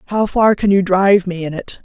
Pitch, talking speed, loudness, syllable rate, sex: 190 Hz, 260 wpm, -15 LUFS, 5.6 syllables/s, female